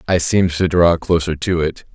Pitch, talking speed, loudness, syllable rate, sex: 85 Hz, 215 wpm, -16 LUFS, 5.2 syllables/s, male